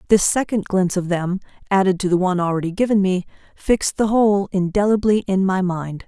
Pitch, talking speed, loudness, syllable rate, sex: 190 Hz, 190 wpm, -19 LUFS, 5.9 syllables/s, female